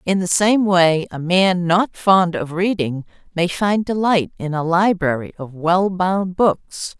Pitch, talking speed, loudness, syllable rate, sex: 180 Hz, 170 wpm, -18 LUFS, 3.7 syllables/s, female